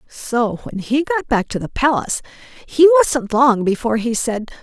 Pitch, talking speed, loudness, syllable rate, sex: 250 Hz, 180 wpm, -17 LUFS, 4.4 syllables/s, female